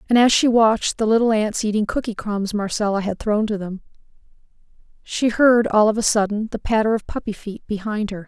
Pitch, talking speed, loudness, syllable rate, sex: 215 Hz, 205 wpm, -20 LUFS, 5.6 syllables/s, female